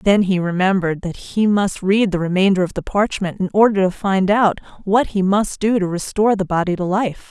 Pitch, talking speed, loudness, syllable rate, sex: 195 Hz, 220 wpm, -18 LUFS, 5.3 syllables/s, female